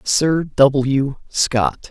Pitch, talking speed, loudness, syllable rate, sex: 140 Hz, 95 wpm, -17 LUFS, 1.7 syllables/s, male